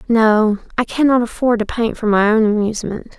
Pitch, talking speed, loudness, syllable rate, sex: 225 Hz, 190 wpm, -16 LUFS, 5.3 syllables/s, female